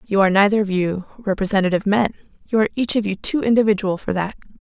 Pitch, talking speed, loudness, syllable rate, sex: 200 Hz, 210 wpm, -19 LUFS, 7.2 syllables/s, female